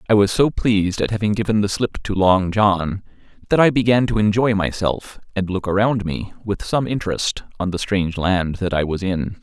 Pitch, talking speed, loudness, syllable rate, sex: 100 Hz, 210 wpm, -19 LUFS, 5.2 syllables/s, male